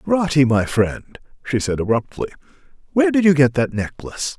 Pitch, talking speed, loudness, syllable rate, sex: 135 Hz, 165 wpm, -19 LUFS, 5.3 syllables/s, male